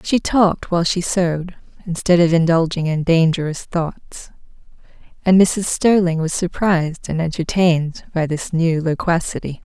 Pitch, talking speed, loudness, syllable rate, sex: 170 Hz, 135 wpm, -18 LUFS, 4.7 syllables/s, female